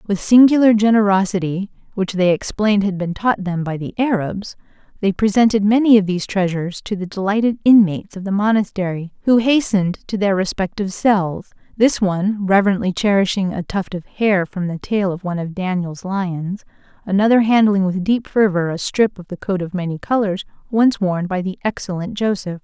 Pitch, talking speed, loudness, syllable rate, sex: 195 Hz, 175 wpm, -18 LUFS, 5.4 syllables/s, female